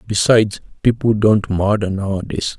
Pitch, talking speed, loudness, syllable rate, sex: 105 Hz, 115 wpm, -17 LUFS, 4.9 syllables/s, male